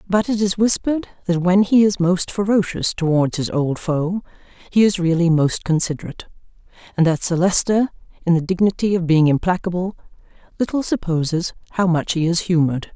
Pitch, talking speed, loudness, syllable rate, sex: 180 Hz, 165 wpm, -19 LUFS, 5.7 syllables/s, female